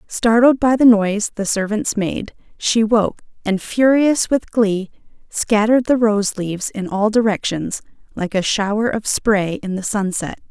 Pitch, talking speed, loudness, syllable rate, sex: 215 Hz, 160 wpm, -17 LUFS, 4.3 syllables/s, female